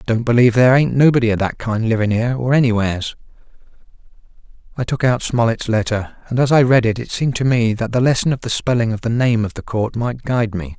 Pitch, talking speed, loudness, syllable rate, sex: 120 Hz, 230 wpm, -17 LUFS, 6.4 syllables/s, male